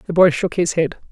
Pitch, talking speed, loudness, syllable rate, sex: 170 Hz, 270 wpm, -17 LUFS, 5.7 syllables/s, female